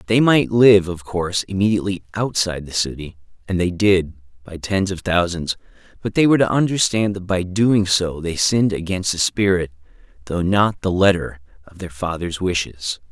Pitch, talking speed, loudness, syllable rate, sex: 95 Hz, 175 wpm, -19 LUFS, 4.9 syllables/s, male